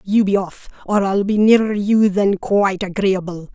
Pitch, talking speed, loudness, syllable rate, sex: 200 Hz, 185 wpm, -17 LUFS, 4.6 syllables/s, female